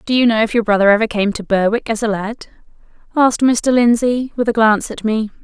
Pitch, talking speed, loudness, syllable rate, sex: 225 Hz, 230 wpm, -15 LUFS, 6.0 syllables/s, female